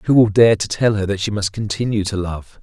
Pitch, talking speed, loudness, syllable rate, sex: 105 Hz, 275 wpm, -18 LUFS, 5.4 syllables/s, male